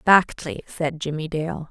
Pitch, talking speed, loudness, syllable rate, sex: 160 Hz, 140 wpm, -24 LUFS, 4.8 syllables/s, female